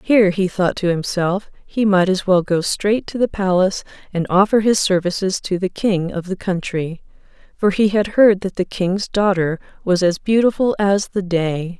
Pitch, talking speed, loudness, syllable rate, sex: 190 Hz, 195 wpm, -18 LUFS, 4.7 syllables/s, female